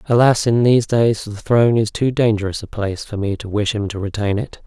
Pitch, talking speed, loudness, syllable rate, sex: 110 Hz, 245 wpm, -18 LUFS, 5.8 syllables/s, male